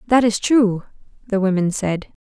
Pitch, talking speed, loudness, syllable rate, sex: 205 Hz, 160 wpm, -19 LUFS, 4.8 syllables/s, female